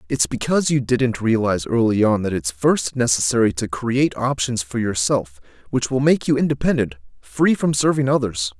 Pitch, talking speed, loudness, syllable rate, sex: 115 Hz, 175 wpm, -19 LUFS, 5.2 syllables/s, male